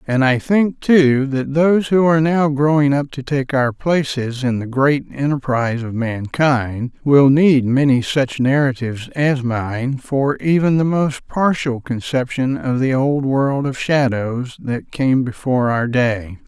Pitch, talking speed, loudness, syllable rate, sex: 135 Hz, 165 wpm, -17 LUFS, 4.0 syllables/s, male